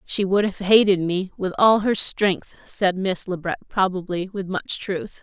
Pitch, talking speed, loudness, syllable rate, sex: 190 Hz, 195 wpm, -21 LUFS, 4.3 syllables/s, female